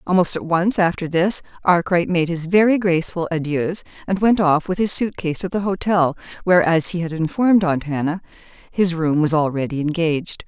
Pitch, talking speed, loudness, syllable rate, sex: 170 Hz, 190 wpm, -19 LUFS, 5.4 syllables/s, female